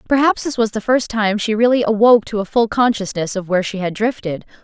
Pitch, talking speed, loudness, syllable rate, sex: 220 Hz, 235 wpm, -17 LUFS, 6.1 syllables/s, female